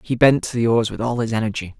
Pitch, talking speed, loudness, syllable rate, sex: 115 Hz, 300 wpm, -19 LUFS, 6.6 syllables/s, male